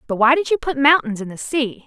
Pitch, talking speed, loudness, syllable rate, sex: 270 Hz, 290 wpm, -18 LUFS, 5.9 syllables/s, female